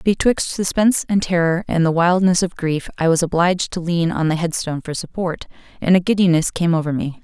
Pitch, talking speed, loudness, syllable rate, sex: 175 Hz, 205 wpm, -18 LUFS, 5.7 syllables/s, female